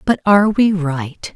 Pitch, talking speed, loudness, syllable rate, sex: 185 Hz, 175 wpm, -15 LUFS, 4.3 syllables/s, female